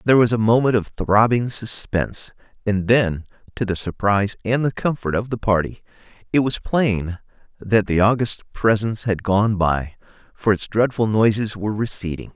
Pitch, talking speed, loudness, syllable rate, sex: 105 Hz, 165 wpm, -20 LUFS, 5.0 syllables/s, male